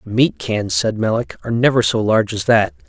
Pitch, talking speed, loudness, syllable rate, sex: 115 Hz, 210 wpm, -17 LUFS, 5.4 syllables/s, male